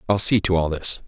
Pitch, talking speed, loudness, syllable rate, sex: 90 Hz, 280 wpm, -19 LUFS, 5.9 syllables/s, male